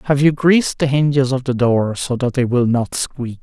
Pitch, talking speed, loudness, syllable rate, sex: 130 Hz, 245 wpm, -17 LUFS, 4.9 syllables/s, male